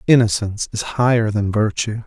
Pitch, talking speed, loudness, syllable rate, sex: 110 Hz, 145 wpm, -18 LUFS, 5.3 syllables/s, male